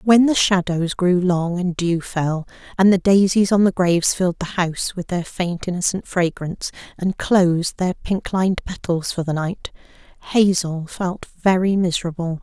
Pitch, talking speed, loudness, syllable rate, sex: 180 Hz, 170 wpm, -20 LUFS, 4.7 syllables/s, female